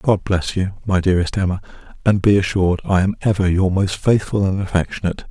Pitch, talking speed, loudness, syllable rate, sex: 95 Hz, 190 wpm, -18 LUFS, 6.1 syllables/s, male